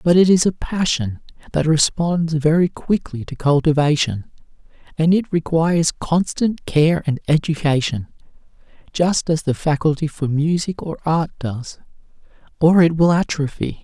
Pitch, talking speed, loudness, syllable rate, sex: 160 Hz, 135 wpm, -18 LUFS, 4.5 syllables/s, male